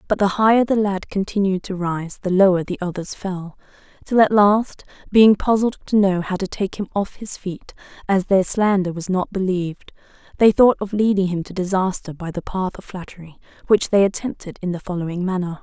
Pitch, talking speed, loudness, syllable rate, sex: 190 Hz, 200 wpm, -19 LUFS, 5.3 syllables/s, female